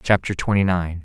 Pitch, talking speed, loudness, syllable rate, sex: 90 Hz, 175 wpm, -20 LUFS, 5.4 syllables/s, male